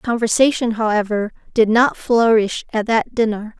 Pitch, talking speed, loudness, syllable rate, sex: 225 Hz, 135 wpm, -17 LUFS, 4.6 syllables/s, female